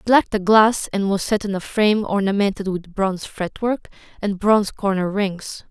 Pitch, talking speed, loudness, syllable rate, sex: 200 Hz, 190 wpm, -20 LUFS, 5.1 syllables/s, female